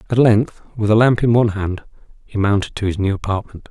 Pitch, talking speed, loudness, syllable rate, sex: 105 Hz, 225 wpm, -18 LUFS, 6.1 syllables/s, male